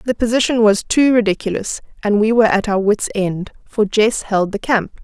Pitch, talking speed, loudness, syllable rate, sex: 215 Hz, 205 wpm, -16 LUFS, 5.0 syllables/s, female